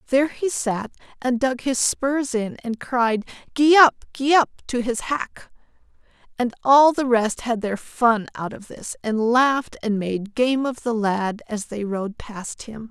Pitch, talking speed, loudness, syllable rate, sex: 240 Hz, 185 wpm, -21 LUFS, 4.0 syllables/s, female